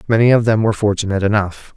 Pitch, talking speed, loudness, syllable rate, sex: 105 Hz, 205 wpm, -15 LUFS, 7.6 syllables/s, male